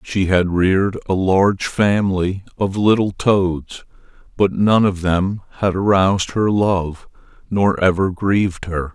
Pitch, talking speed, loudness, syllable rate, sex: 95 Hz, 140 wpm, -17 LUFS, 4.0 syllables/s, male